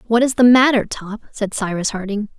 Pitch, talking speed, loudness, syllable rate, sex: 220 Hz, 200 wpm, -17 LUFS, 5.4 syllables/s, female